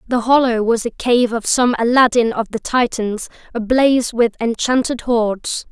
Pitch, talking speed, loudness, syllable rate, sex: 235 Hz, 155 wpm, -16 LUFS, 4.4 syllables/s, female